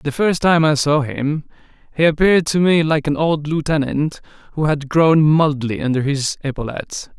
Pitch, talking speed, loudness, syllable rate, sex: 150 Hz, 175 wpm, -17 LUFS, 4.7 syllables/s, male